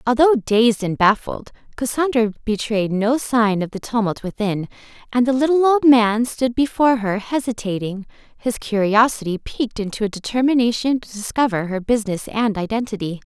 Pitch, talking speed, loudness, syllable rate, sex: 225 Hz, 150 wpm, -19 LUFS, 5.2 syllables/s, female